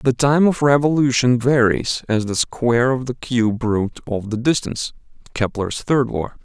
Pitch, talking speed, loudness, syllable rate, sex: 125 Hz, 170 wpm, -18 LUFS, 4.4 syllables/s, male